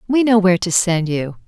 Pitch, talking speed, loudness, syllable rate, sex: 190 Hz, 245 wpm, -16 LUFS, 5.6 syllables/s, female